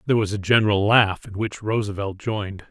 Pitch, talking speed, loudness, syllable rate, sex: 105 Hz, 200 wpm, -21 LUFS, 5.9 syllables/s, male